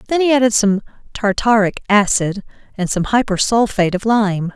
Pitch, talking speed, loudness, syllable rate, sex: 210 Hz, 145 wpm, -16 LUFS, 5.2 syllables/s, female